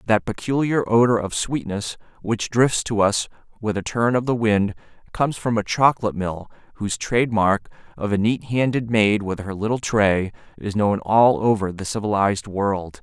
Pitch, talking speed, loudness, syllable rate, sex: 110 Hz, 180 wpm, -21 LUFS, 5.0 syllables/s, male